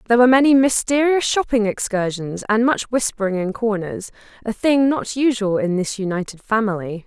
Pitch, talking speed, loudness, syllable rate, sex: 220 Hz, 155 wpm, -19 LUFS, 5.4 syllables/s, female